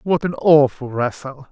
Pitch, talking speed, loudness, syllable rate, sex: 145 Hz, 160 wpm, -17 LUFS, 4.2 syllables/s, male